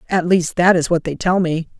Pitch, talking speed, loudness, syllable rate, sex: 170 Hz, 270 wpm, -17 LUFS, 5.2 syllables/s, female